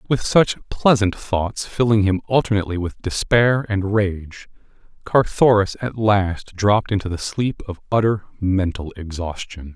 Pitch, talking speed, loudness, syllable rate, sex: 100 Hz, 135 wpm, -20 LUFS, 4.3 syllables/s, male